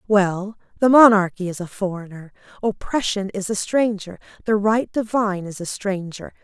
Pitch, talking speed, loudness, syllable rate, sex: 200 Hz, 150 wpm, -20 LUFS, 4.9 syllables/s, female